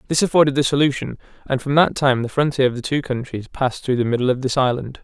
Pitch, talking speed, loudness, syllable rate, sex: 135 Hz, 250 wpm, -19 LUFS, 6.6 syllables/s, male